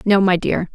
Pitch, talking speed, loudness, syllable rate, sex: 190 Hz, 245 wpm, -17 LUFS, 4.8 syllables/s, female